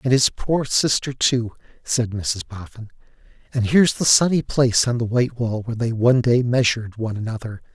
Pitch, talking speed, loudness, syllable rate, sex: 120 Hz, 185 wpm, -20 LUFS, 5.6 syllables/s, male